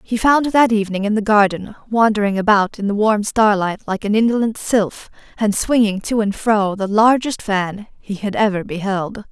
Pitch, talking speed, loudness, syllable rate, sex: 210 Hz, 195 wpm, -17 LUFS, 4.9 syllables/s, female